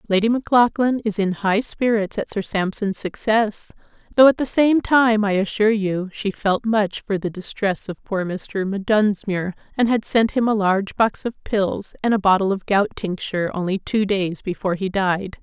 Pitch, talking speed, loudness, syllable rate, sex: 205 Hz, 190 wpm, -20 LUFS, 4.6 syllables/s, female